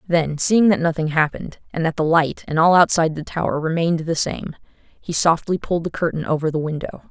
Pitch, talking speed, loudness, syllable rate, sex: 165 Hz, 210 wpm, -19 LUFS, 6.0 syllables/s, female